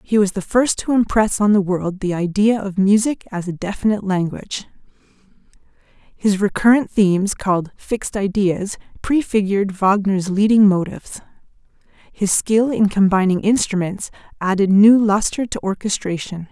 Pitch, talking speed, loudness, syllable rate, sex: 200 Hz, 135 wpm, -18 LUFS, 5.0 syllables/s, female